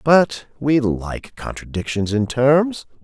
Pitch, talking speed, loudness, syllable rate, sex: 130 Hz, 120 wpm, -19 LUFS, 3.4 syllables/s, male